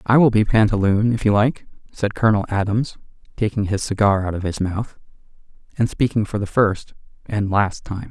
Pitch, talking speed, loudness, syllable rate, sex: 105 Hz, 185 wpm, -20 LUFS, 5.2 syllables/s, male